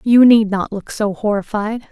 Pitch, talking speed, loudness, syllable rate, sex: 215 Hz, 190 wpm, -16 LUFS, 4.4 syllables/s, female